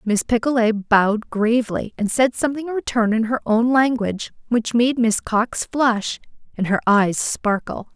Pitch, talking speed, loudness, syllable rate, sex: 230 Hz, 165 wpm, -19 LUFS, 4.6 syllables/s, female